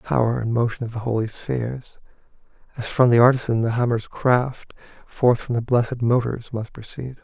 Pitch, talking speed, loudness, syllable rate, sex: 120 Hz, 185 wpm, -21 LUFS, 5.3 syllables/s, male